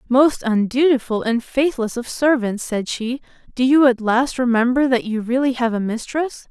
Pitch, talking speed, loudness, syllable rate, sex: 245 Hz, 175 wpm, -19 LUFS, 4.7 syllables/s, female